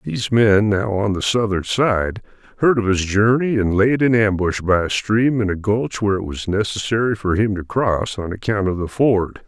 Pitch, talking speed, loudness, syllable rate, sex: 105 Hz, 205 wpm, -18 LUFS, 4.8 syllables/s, male